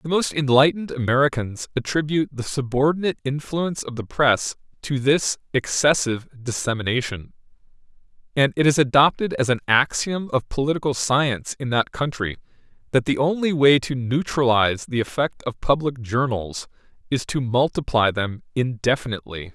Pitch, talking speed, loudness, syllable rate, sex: 135 Hz, 135 wpm, -21 LUFS, 5.3 syllables/s, male